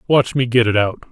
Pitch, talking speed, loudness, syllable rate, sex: 120 Hz, 270 wpm, -16 LUFS, 5.6 syllables/s, male